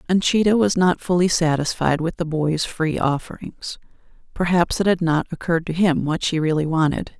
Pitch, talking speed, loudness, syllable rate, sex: 165 Hz, 175 wpm, -20 LUFS, 5.2 syllables/s, female